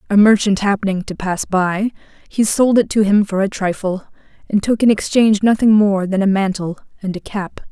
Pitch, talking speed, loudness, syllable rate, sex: 200 Hz, 200 wpm, -16 LUFS, 5.3 syllables/s, female